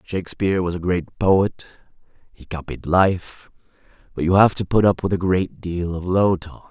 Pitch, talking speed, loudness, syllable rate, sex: 90 Hz, 190 wpm, -20 LUFS, 4.7 syllables/s, male